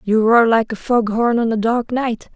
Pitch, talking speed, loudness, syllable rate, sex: 230 Hz, 230 wpm, -17 LUFS, 4.5 syllables/s, female